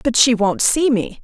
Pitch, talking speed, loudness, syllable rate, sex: 240 Hz, 245 wpm, -15 LUFS, 4.4 syllables/s, female